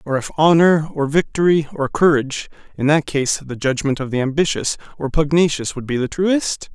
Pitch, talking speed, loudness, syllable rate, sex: 150 Hz, 185 wpm, -18 LUFS, 5.3 syllables/s, male